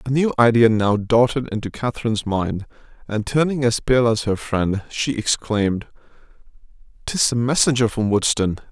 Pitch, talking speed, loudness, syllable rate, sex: 115 Hz, 150 wpm, -19 LUFS, 5.0 syllables/s, male